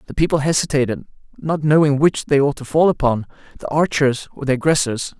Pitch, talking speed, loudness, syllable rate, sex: 140 Hz, 185 wpm, -18 LUFS, 5.9 syllables/s, male